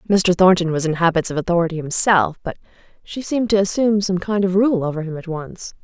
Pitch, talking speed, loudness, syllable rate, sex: 180 Hz, 215 wpm, -18 LUFS, 6.1 syllables/s, female